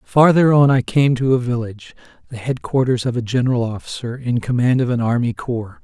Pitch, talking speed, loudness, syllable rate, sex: 125 Hz, 195 wpm, -18 LUFS, 5.6 syllables/s, male